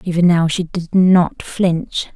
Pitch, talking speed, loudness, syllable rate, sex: 175 Hz, 165 wpm, -16 LUFS, 3.5 syllables/s, female